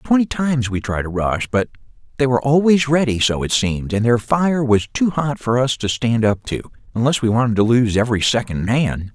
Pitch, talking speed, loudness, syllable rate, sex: 120 Hz, 210 wpm, -18 LUFS, 5.4 syllables/s, male